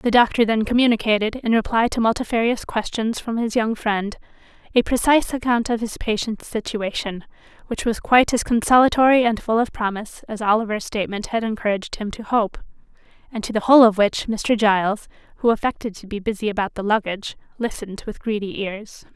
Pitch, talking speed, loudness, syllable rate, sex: 220 Hz, 180 wpm, -20 LUFS, 5.9 syllables/s, female